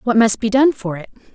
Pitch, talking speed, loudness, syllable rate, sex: 225 Hz, 270 wpm, -16 LUFS, 5.8 syllables/s, female